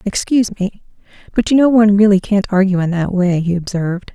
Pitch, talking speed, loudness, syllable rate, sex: 195 Hz, 205 wpm, -15 LUFS, 6.0 syllables/s, female